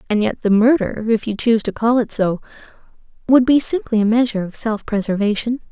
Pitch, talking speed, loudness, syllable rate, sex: 225 Hz, 200 wpm, -17 LUFS, 6.0 syllables/s, female